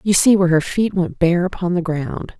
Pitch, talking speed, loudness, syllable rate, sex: 180 Hz, 250 wpm, -17 LUFS, 5.2 syllables/s, female